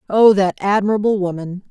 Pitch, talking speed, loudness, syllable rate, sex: 195 Hz, 140 wpm, -16 LUFS, 5.6 syllables/s, female